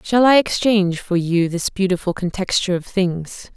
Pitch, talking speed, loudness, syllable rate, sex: 190 Hz, 170 wpm, -18 LUFS, 4.9 syllables/s, female